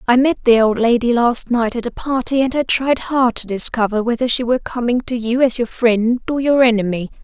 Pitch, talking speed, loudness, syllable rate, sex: 240 Hz, 230 wpm, -16 LUFS, 5.4 syllables/s, female